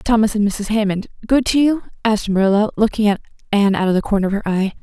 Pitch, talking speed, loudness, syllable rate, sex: 210 Hz, 225 wpm, -17 LUFS, 7.0 syllables/s, female